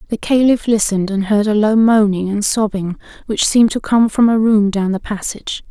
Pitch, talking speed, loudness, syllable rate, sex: 210 Hz, 210 wpm, -15 LUFS, 5.4 syllables/s, female